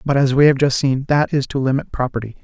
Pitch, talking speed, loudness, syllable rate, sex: 135 Hz, 270 wpm, -17 LUFS, 6.3 syllables/s, male